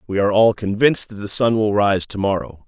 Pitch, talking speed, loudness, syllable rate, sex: 105 Hz, 245 wpm, -18 LUFS, 6.0 syllables/s, male